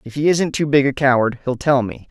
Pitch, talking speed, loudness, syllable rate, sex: 135 Hz, 285 wpm, -17 LUFS, 5.6 syllables/s, male